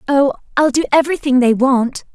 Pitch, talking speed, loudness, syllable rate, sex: 270 Hz, 170 wpm, -15 LUFS, 5.7 syllables/s, female